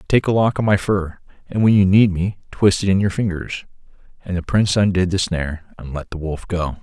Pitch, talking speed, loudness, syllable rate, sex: 95 Hz, 235 wpm, -19 LUFS, 5.6 syllables/s, male